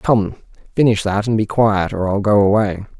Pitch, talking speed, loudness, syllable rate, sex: 105 Hz, 200 wpm, -17 LUFS, 4.8 syllables/s, male